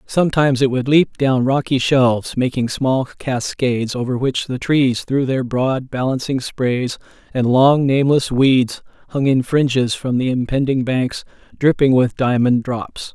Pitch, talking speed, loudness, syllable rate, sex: 130 Hz, 155 wpm, -17 LUFS, 4.3 syllables/s, male